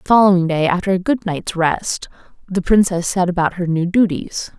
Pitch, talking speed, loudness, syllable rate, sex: 180 Hz, 195 wpm, -17 LUFS, 5.1 syllables/s, female